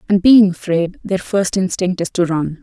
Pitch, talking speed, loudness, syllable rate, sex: 185 Hz, 185 wpm, -16 LUFS, 4.6 syllables/s, female